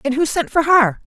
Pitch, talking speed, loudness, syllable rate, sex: 280 Hz, 260 wpm, -16 LUFS, 5.3 syllables/s, female